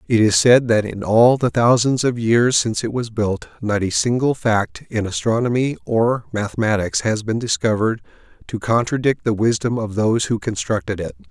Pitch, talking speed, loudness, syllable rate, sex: 115 Hz, 180 wpm, -18 LUFS, 5.1 syllables/s, male